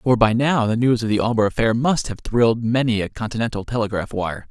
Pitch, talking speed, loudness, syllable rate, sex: 115 Hz, 225 wpm, -20 LUFS, 5.8 syllables/s, male